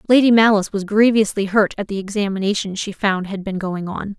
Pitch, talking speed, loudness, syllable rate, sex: 200 Hz, 200 wpm, -18 LUFS, 5.8 syllables/s, female